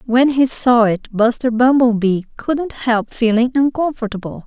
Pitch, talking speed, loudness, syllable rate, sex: 240 Hz, 135 wpm, -16 LUFS, 4.3 syllables/s, female